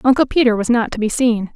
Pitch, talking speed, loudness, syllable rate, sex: 235 Hz, 270 wpm, -16 LUFS, 6.3 syllables/s, female